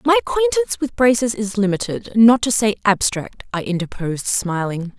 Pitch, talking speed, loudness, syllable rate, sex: 225 Hz, 155 wpm, -18 LUFS, 5.1 syllables/s, female